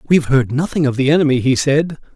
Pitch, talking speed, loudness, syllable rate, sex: 140 Hz, 250 wpm, -15 LUFS, 6.7 syllables/s, male